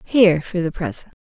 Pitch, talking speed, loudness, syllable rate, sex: 175 Hz, 195 wpm, -19 LUFS, 5.7 syllables/s, female